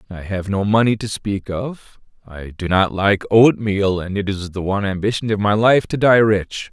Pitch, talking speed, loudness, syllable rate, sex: 100 Hz, 215 wpm, -18 LUFS, 4.7 syllables/s, male